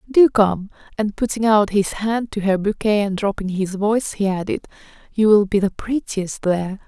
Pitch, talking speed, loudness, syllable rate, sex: 205 Hz, 190 wpm, -19 LUFS, 5.0 syllables/s, female